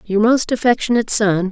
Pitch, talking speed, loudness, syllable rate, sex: 220 Hz, 160 wpm, -16 LUFS, 5.7 syllables/s, female